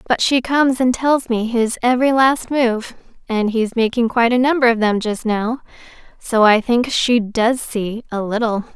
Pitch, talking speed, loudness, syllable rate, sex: 235 Hz, 185 wpm, -17 LUFS, 3.3 syllables/s, female